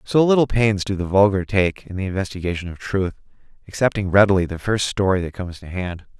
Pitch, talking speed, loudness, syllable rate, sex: 95 Hz, 205 wpm, -20 LUFS, 6.0 syllables/s, male